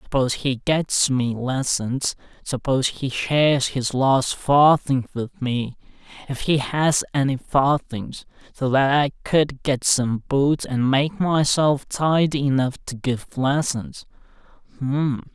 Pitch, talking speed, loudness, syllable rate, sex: 135 Hz, 135 wpm, -21 LUFS, 3.6 syllables/s, male